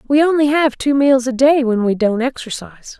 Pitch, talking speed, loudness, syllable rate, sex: 260 Hz, 220 wpm, -15 LUFS, 5.3 syllables/s, female